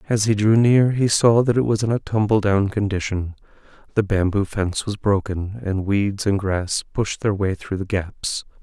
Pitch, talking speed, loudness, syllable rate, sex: 105 Hz, 200 wpm, -20 LUFS, 4.6 syllables/s, male